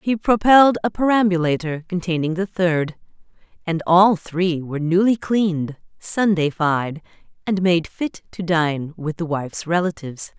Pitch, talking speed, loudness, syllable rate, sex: 175 Hz, 125 wpm, -19 LUFS, 4.6 syllables/s, female